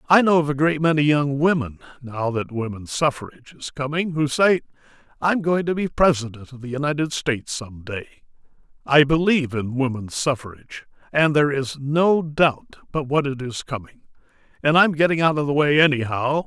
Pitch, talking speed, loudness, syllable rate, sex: 145 Hz, 190 wpm, -21 LUFS, 5.4 syllables/s, male